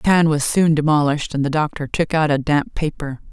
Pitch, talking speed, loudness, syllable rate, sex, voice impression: 150 Hz, 235 wpm, -18 LUFS, 5.6 syllables/s, female, feminine, adult-like, slightly powerful, clear, fluent, intellectual, slightly calm, unique, slightly elegant, lively, slightly strict, slightly intense, slightly sharp